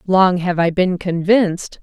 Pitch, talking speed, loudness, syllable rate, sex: 180 Hz, 165 wpm, -16 LUFS, 4.1 syllables/s, female